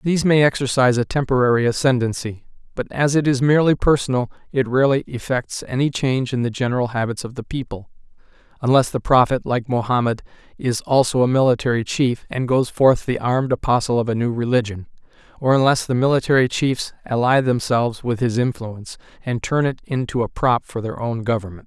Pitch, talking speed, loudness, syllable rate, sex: 125 Hz, 175 wpm, -19 LUFS, 5.9 syllables/s, male